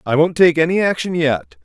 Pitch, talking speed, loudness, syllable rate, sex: 150 Hz, 220 wpm, -16 LUFS, 5.4 syllables/s, male